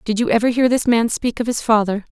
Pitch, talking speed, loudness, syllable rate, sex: 230 Hz, 280 wpm, -18 LUFS, 6.1 syllables/s, female